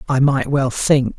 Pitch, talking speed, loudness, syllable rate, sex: 135 Hz, 200 wpm, -17 LUFS, 3.8 syllables/s, male